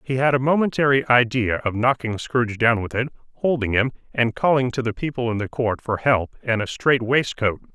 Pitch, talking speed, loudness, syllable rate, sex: 120 Hz, 210 wpm, -21 LUFS, 5.4 syllables/s, male